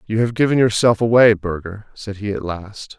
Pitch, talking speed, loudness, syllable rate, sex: 105 Hz, 200 wpm, -17 LUFS, 5.1 syllables/s, male